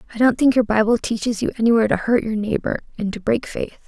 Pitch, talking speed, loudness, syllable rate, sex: 225 Hz, 250 wpm, -20 LUFS, 6.7 syllables/s, female